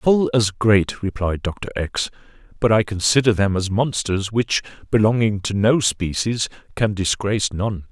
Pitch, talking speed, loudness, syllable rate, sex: 105 Hz, 150 wpm, -20 LUFS, 4.3 syllables/s, male